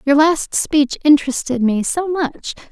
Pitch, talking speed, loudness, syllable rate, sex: 285 Hz, 155 wpm, -16 LUFS, 4.2 syllables/s, female